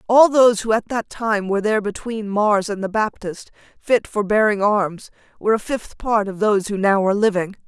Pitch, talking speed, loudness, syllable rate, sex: 210 Hz, 210 wpm, -19 LUFS, 5.4 syllables/s, female